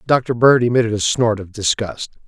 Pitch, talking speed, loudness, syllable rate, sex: 115 Hz, 185 wpm, -17 LUFS, 5.0 syllables/s, male